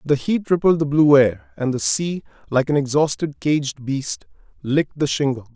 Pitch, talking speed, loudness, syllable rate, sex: 145 Hz, 185 wpm, -19 LUFS, 4.6 syllables/s, male